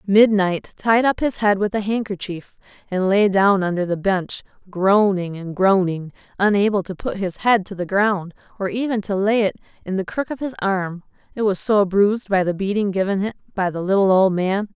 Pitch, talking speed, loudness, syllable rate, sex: 195 Hz, 205 wpm, -20 LUFS, 5.0 syllables/s, female